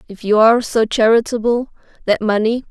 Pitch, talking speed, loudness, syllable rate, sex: 225 Hz, 155 wpm, -15 LUFS, 5.6 syllables/s, female